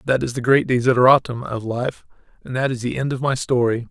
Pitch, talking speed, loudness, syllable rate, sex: 125 Hz, 230 wpm, -19 LUFS, 6.0 syllables/s, male